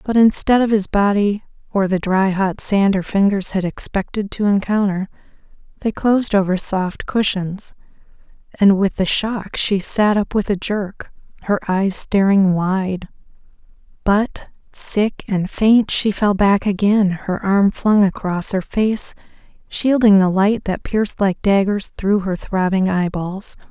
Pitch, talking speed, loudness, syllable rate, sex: 200 Hz, 155 wpm, -18 LUFS, 4.0 syllables/s, female